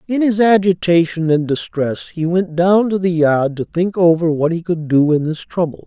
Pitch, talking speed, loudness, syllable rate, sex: 170 Hz, 215 wpm, -16 LUFS, 4.7 syllables/s, male